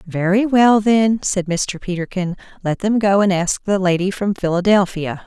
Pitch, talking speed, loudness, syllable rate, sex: 190 Hz, 170 wpm, -17 LUFS, 4.5 syllables/s, female